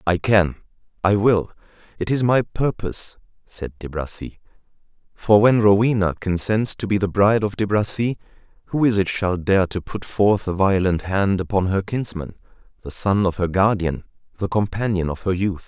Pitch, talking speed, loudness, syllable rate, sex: 100 Hz, 160 wpm, -20 LUFS, 4.9 syllables/s, male